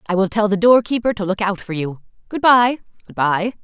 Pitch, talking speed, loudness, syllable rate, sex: 205 Hz, 215 wpm, -17 LUFS, 5.5 syllables/s, female